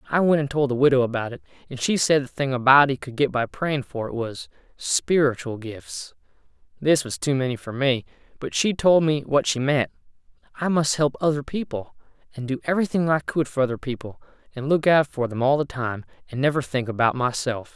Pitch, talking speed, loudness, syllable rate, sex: 135 Hz, 215 wpm, -23 LUFS, 5.5 syllables/s, male